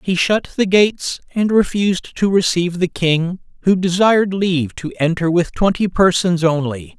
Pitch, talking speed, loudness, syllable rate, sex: 180 Hz, 165 wpm, -17 LUFS, 4.9 syllables/s, male